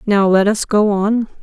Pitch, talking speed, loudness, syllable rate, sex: 205 Hz, 210 wpm, -15 LUFS, 4.2 syllables/s, female